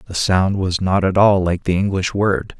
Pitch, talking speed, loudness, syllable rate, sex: 95 Hz, 230 wpm, -17 LUFS, 4.6 syllables/s, male